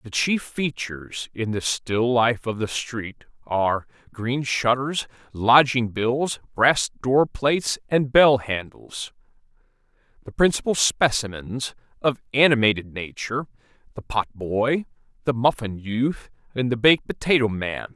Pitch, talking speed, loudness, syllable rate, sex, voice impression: 120 Hz, 125 wpm, -22 LUFS, 4.1 syllables/s, male, masculine, very adult-like, slightly halting, refreshing, friendly, lively